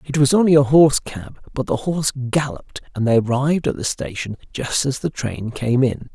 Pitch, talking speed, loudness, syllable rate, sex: 130 Hz, 215 wpm, -19 LUFS, 5.3 syllables/s, male